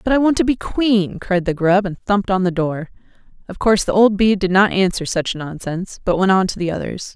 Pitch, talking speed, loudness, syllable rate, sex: 195 Hz, 250 wpm, -18 LUFS, 5.6 syllables/s, female